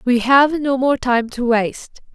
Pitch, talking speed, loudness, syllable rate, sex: 255 Hz, 195 wpm, -16 LUFS, 4.1 syllables/s, female